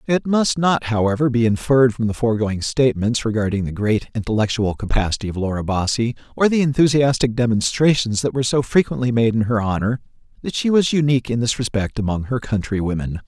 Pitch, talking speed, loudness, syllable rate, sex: 120 Hz, 180 wpm, -19 LUFS, 6.0 syllables/s, male